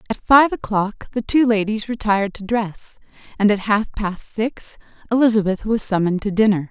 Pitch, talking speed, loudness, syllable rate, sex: 210 Hz, 170 wpm, -19 LUFS, 5.2 syllables/s, female